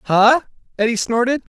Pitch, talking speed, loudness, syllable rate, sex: 240 Hz, 115 wpm, -17 LUFS, 5.6 syllables/s, female